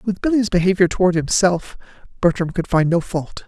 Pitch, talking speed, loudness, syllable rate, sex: 180 Hz, 170 wpm, -18 LUFS, 5.3 syllables/s, female